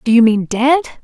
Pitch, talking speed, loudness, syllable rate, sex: 250 Hz, 230 wpm, -13 LUFS, 5.1 syllables/s, female